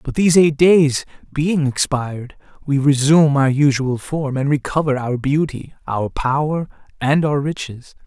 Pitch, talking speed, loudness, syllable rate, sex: 140 Hz, 150 wpm, -17 LUFS, 4.5 syllables/s, male